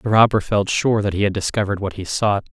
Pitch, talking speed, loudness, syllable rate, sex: 100 Hz, 260 wpm, -19 LUFS, 6.2 syllables/s, male